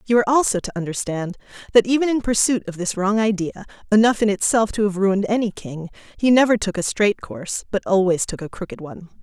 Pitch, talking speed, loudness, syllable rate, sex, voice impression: 205 Hz, 215 wpm, -20 LUFS, 5.2 syllables/s, female, feminine, adult-like, tensed, powerful, clear, fluent, intellectual, slightly friendly, reassuring, lively